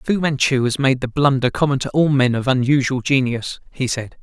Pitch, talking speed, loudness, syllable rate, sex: 130 Hz, 215 wpm, -18 LUFS, 5.3 syllables/s, male